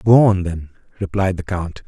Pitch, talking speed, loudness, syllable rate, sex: 95 Hz, 190 wpm, -19 LUFS, 4.8 syllables/s, male